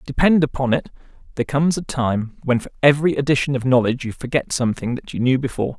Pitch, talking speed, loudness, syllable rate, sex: 130 Hz, 205 wpm, -20 LUFS, 6.9 syllables/s, male